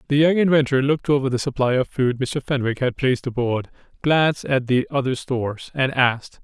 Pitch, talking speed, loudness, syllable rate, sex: 130 Hz, 195 wpm, -21 LUFS, 5.7 syllables/s, male